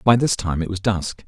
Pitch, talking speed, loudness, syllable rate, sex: 95 Hz, 280 wpm, -21 LUFS, 5.1 syllables/s, male